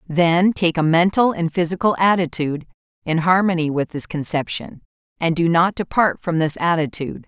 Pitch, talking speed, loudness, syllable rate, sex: 170 Hz, 155 wpm, -19 LUFS, 5.2 syllables/s, female